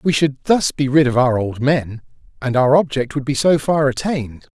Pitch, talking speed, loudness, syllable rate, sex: 140 Hz, 225 wpm, -17 LUFS, 4.9 syllables/s, male